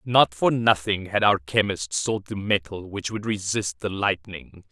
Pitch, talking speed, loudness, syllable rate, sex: 95 Hz, 180 wpm, -24 LUFS, 4.2 syllables/s, male